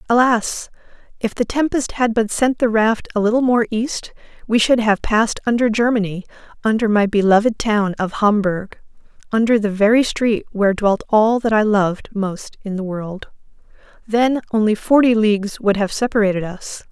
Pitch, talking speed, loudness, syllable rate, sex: 215 Hz, 165 wpm, -17 LUFS, 5.0 syllables/s, female